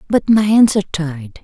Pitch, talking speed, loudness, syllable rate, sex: 190 Hz, 210 wpm, -14 LUFS, 4.8 syllables/s, female